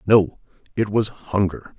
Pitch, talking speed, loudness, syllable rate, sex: 95 Hz, 135 wpm, -22 LUFS, 3.9 syllables/s, male